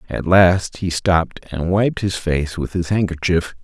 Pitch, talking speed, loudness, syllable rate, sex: 90 Hz, 180 wpm, -18 LUFS, 4.2 syllables/s, male